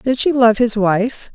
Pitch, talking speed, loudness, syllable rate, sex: 230 Hz, 220 wpm, -15 LUFS, 3.8 syllables/s, female